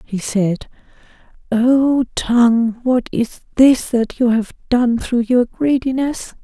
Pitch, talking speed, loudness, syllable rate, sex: 240 Hz, 130 wpm, -16 LUFS, 3.3 syllables/s, female